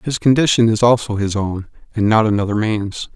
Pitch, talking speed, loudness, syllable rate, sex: 110 Hz, 190 wpm, -16 LUFS, 5.4 syllables/s, male